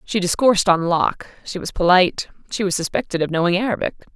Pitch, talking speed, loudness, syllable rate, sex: 185 Hz, 190 wpm, -19 LUFS, 6.6 syllables/s, female